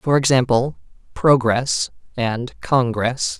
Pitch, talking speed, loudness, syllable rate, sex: 125 Hz, 90 wpm, -19 LUFS, 3.3 syllables/s, male